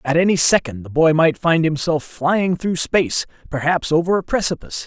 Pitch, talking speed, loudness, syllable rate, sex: 160 Hz, 175 wpm, -18 LUFS, 5.3 syllables/s, male